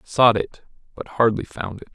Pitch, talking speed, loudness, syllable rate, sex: 110 Hz, 185 wpm, -21 LUFS, 4.7 syllables/s, male